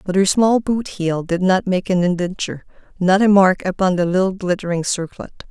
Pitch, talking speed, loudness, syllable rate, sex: 185 Hz, 195 wpm, -18 LUFS, 5.1 syllables/s, female